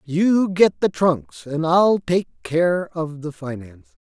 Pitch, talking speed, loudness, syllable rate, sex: 165 Hz, 160 wpm, -20 LUFS, 3.5 syllables/s, male